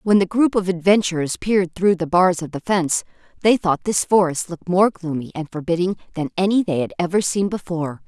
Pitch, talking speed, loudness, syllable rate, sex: 180 Hz, 210 wpm, -20 LUFS, 5.8 syllables/s, female